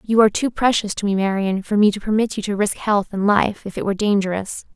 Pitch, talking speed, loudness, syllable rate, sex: 205 Hz, 265 wpm, -19 LUFS, 6.2 syllables/s, female